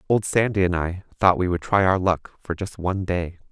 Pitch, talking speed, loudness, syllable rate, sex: 95 Hz, 240 wpm, -22 LUFS, 5.3 syllables/s, male